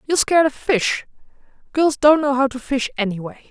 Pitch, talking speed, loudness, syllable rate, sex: 270 Hz, 190 wpm, -18 LUFS, 5.3 syllables/s, female